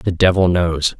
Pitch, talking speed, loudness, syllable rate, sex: 90 Hz, 180 wpm, -16 LUFS, 4.2 syllables/s, male